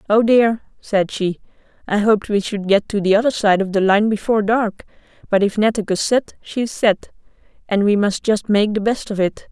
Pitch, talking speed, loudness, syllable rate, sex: 210 Hz, 210 wpm, -18 LUFS, 5.2 syllables/s, female